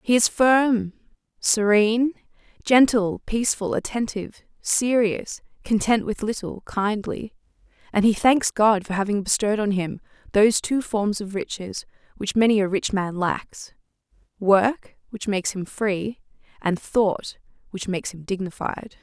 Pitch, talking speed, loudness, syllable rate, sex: 210 Hz, 135 wpm, -22 LUFS, 4.4 syllables/s, female